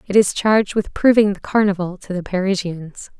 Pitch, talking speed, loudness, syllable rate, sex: 195 Hz, 190 wpm, -18 LUFS, 5.3 syllables/s, female